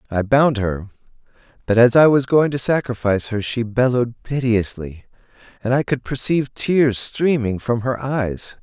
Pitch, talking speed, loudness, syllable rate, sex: 120 Hz, 160 wpm, -19 LUFS, 4.7 syllables/s, male